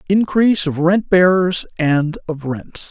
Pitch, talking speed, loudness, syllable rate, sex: 170 Hz, 145 wpm, -16 LUFS, 4.0 syllables/s, male